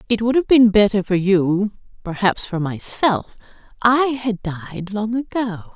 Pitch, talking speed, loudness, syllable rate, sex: 210 Hz, 155 wpm, -19 LUFS, 4.1 syllables/s, female